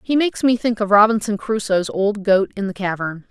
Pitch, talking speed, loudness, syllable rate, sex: 205 Hz, 220 wpm, -18 LUFS, 5.4 syllables/s, female